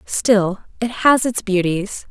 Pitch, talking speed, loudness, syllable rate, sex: 210 Hz, 140 wpm, -18 LUFS, 3.2 syllables/s, female